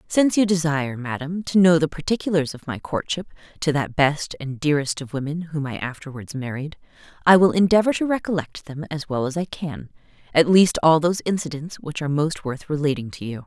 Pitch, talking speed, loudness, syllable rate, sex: 155 Hz, 200 wpm, -22 LUFS, 5.8 syllables/s, female